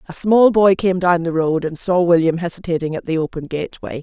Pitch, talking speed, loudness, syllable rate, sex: 170 Hz, 225 wpm, -17 LUFS, 5.7 syllables/s, female